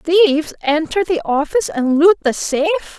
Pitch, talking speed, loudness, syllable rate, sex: 325 Hz, 160 wpm, -16 LUFS, 5.2 syllables/s, female